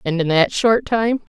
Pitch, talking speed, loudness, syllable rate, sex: 205 Hz, 220 wpm, -17 LUFS, 4.4 syllables/s, female